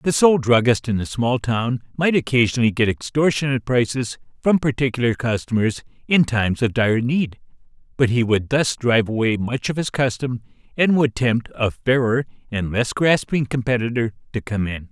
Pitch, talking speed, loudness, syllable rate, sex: 120 Hz, 170 wpm, -20 LUFS, 5.1 syllables/s, male